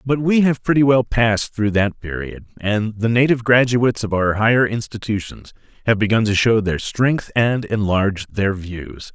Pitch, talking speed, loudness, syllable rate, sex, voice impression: 110 Hz, 175 wpm, -18 LUFS, 4.8 syllables/s, male, masculine, adult-like, slightly thick, cool, slightly wild